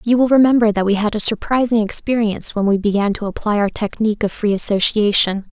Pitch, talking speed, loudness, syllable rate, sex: 215 Hz, 205 wpm, -16 LUFS, 6.1 syllables/s, female